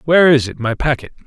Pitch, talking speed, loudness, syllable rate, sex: 135 Hz, 235 wpm, -15 LUFS, 6.9 syllables/s, male